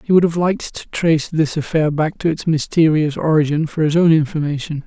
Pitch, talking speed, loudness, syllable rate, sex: 155 Hz, 210 wpm, -17 LUFS, 5.7 syllables/s, male